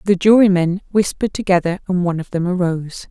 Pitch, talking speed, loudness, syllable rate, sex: 185 Hz, 175 wpm, -17 LUFS, 6.5 syllables/s, female